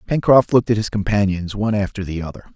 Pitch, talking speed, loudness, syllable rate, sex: 105 Hz, 210 wpm, -18 LUFS, 6.9 syllables/s, male